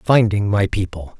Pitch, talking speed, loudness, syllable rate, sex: 100 Hz, 150 wpm, -18 LUFS, 4.4 syllables/s, male